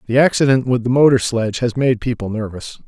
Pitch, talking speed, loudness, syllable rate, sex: 120 Hz, 210 wpm, -16 LUFS, 6.0 syllables/s, male